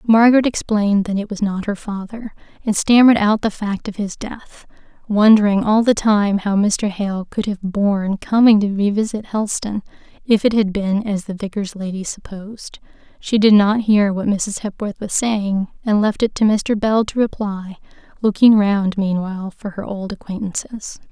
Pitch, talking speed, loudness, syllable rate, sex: 205 Hz, 180 wpm, -17 LUFS, 4.8 syllables/s, female